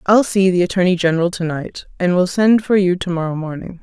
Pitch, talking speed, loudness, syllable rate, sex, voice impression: 180 Hz, 235 wpm, -17 LUFS, 5.9 syllables/s, female, feminine, slightly young, tensed, clear, fluent, intellectual, calm, sharp